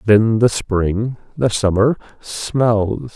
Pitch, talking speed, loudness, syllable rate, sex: 110 Hz, 115 wpm, -17 LUFS, 2.7 syllables/s, male